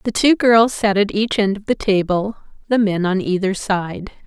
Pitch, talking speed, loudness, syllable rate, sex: 205 Hz, 210 wpm, -17 LUFS, 4.6 syllables/s, female